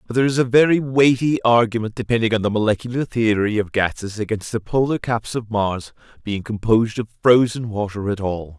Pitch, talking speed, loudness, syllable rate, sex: 110 Hz, 190 wpm, -19 LUFS, 5.6 syllables/s, male